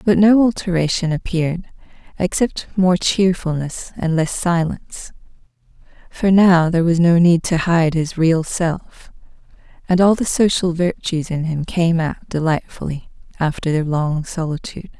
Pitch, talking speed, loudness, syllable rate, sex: 170 Hz, 140 wpm, -18 LUFS, 4.5 syllables/s, female